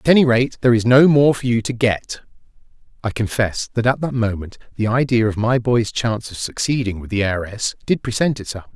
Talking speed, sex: 235 wpm, male